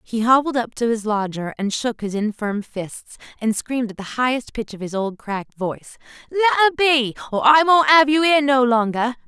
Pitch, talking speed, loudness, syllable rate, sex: 245 Hz, 215 wpm, -19 LUFS, 5.3 syllables/s, female